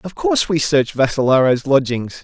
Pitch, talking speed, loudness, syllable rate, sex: 140 Hz, 160 wpm, -16 LUFS, 5.5 syllables/s, male